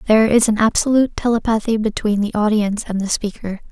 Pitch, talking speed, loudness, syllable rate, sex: 215 Hz, 180 wpm, -17 LUFS, 6.4 syllables/s, female